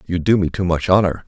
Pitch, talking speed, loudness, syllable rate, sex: 90 Hz, 280 wpm, -17 LUFS, 6.2 syllables/s, male